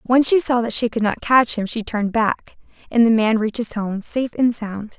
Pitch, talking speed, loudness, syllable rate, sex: 225 Hz, 255 wpm, -19 LUFS, 5.3 syllables/s, female